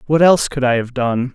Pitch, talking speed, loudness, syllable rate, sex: 135 Hz, 270 wpm, -16 LUFS, 5.9 syllables/s, male